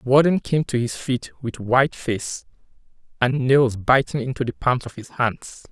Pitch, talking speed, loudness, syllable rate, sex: 125 Hz, 190 wpm, -21 LUFS, 4.6 syllables/s, male